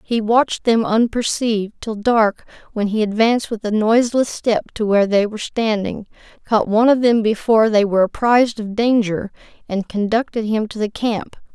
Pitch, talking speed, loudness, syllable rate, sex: 220 Hz, 175 wpm, -18 LUFS, 5.3 syllables/s, female